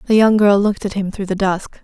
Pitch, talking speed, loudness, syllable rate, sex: 200 Hz, 295 wpm, -16 LUFS, 6.1 syllables/s, female